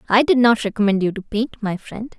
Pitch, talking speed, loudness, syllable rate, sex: 220 Hz, 245 wpm, -19 LUFS, 5.7 syllables/s, female